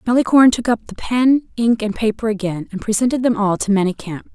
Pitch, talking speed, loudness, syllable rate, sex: 225 Hz, 205 wpm, -17 LUFS, 6.0 syllables/s, female